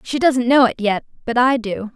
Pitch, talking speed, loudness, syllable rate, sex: 240 Hz, 245 wpm, -17 LUFS, 5.0 syllables/s, female